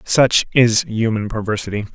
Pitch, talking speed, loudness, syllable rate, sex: 110 Hz, 125 wpm, -17 LUFS, 4.8 syllables/s, male